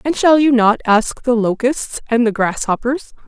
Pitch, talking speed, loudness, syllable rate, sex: 240 Hz, 185 wpm, -16 LUFS, 4.4 syllables/s, female